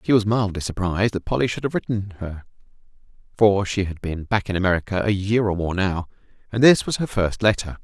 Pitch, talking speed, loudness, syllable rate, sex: 100 Hz, 215 wpm, -22 LUFS, 5.9 syllables/s, male